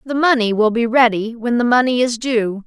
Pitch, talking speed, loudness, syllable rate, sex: 235 Hz, 225 wpm, -16 LUFS, 5.1 syllables/s, female